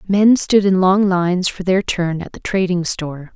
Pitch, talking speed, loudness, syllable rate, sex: 185 Hz, 215 wpm, -16 LUFS, 4.7 syllables/s, female